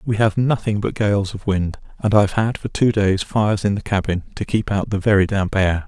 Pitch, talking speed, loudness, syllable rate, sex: 100 Hz, 255 wpm, -19 LUFS, 5.3 syllables/s, male